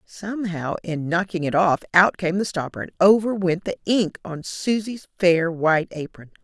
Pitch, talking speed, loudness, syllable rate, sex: 180 Hz, 175 wpm, -22 LUFS, 4.8 syllables/s, female